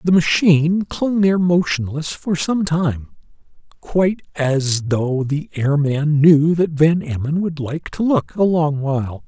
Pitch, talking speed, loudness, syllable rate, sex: 155 Hz, 155 wpm, -18 LUFS, 4.0 syllables/s, male